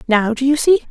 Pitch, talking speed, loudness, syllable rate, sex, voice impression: 260 Hz, 265 wpm, -15 LUFS, 5.5 syllables/s, female, very feminine, slightly young, slightly adult-like, very thin, very tensed, powerful, very bright, very hard, very clear, very fluent, cute, very intellectual, very refreshing, sincere, slightly calm, slightly friendly, slightly reassuring, very unique, elegant, slightly wild, very lively, slightly strict, slightly intense, slightly sharp